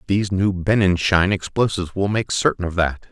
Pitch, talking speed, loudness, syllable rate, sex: 95 Hz, 175 wpm, -20 LUFS, 5.5 syllables/s, male